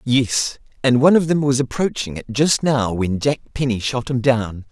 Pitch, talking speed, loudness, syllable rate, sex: 125 Hz, 205 wpm, -19 LUFS, 4.8 syllables/s, male